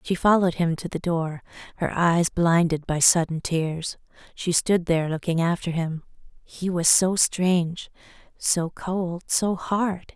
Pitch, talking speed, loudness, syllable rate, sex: 170 Hz, 155 wpm, -23 LUFS, 4.0 syllables/s, female